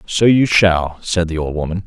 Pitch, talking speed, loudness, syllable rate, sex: 90 Hz, 225 wpm, -15 LUFS, 4.7 syllables/s, male